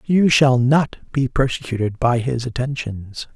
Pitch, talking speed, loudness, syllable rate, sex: 125 Hz, 145 wpm, -19 LUFS, 4.2 syllables/s, male